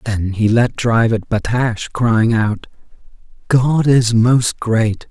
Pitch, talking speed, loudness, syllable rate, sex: 115 Hz, 140 wpm, -15 LUFS, 3.4 syllables/s, male